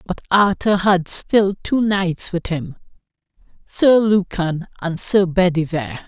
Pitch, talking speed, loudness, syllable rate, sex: 185 Hz, 130 wpm, -18 LUFS, 3.8 syllables/s, female